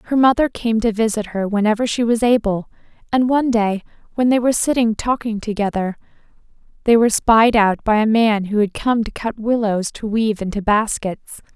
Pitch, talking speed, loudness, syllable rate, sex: 220 Hz, 185 wpm, -18 LUFS, 5.4 syllables/s, female